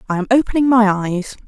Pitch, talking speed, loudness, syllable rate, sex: 220 Hz, 205 wpm, -16 LUFS, 6.1 syllables/s, female